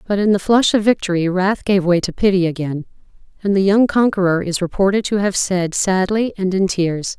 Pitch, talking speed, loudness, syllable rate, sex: 190 Hz, 210 wpm, -17 LUFS, 5.3 syllables/s, female